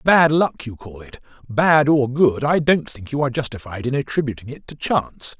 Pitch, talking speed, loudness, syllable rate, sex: 135 Hz, 210 wpm, -19 LUFS, 5.2 syllables/s, male